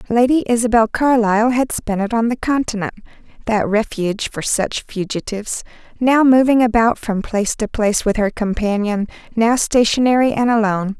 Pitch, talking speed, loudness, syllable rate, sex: 225 Hz, 140 wpm, -17 LUFS, 5.3 syllables/s, female